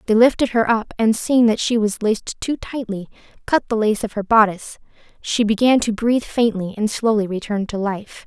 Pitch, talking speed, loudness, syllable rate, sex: 220 Hz, 205 wpm, -19 LUFS, 5.4 syllables/s, female